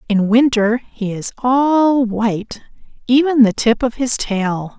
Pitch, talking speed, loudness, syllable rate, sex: 235 Hz, 150 wpm, -16 LUFS, 3.8 syllables/s, female